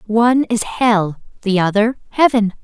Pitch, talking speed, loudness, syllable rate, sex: 220 Hz, 115 wpm, -16 LUFS, 4.6 syllables/s, female